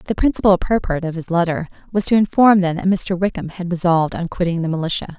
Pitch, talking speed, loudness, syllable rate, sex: 175 Hz, 220 wpm, -18 LUFS, 6.1 syllables/s, female